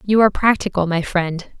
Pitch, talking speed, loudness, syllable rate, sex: 190 Hz, 190 wpm, -18 LUFS, 5.7 syllables/s, female